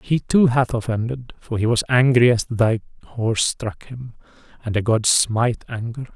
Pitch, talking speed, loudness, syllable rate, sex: 120 Hz, 175 wpm, -20 LUFS, 4.8 syllables/s, male